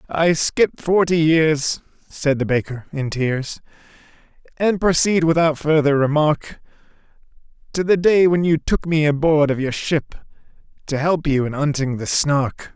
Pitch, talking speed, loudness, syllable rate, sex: 155 Hz, 150 wpm, -18 LUFS, 4.2 syllables/s, male